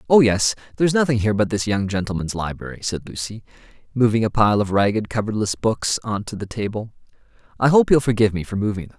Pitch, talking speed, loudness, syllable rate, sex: 110 Hz, 215 wpm, -20 LUFS, 6.5 syllables/s, male